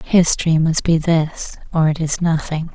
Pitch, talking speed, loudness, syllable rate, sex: 160 Hz, 175 wpm, -17 LUFS, 4.3 syllables/s, female